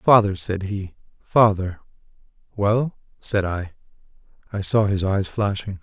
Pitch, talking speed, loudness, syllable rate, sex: 100 Hz, 125 wpm, -22 LUFS, 4.1 syllables/s, male